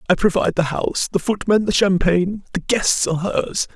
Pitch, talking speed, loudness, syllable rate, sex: 185 Hz, 190 wpm, -19 LUFS, 5.7 syllables/s, male